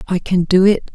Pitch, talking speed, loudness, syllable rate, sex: 185 Hz, 255 wpm, -15 LUFS, 5.1 syllables/s, female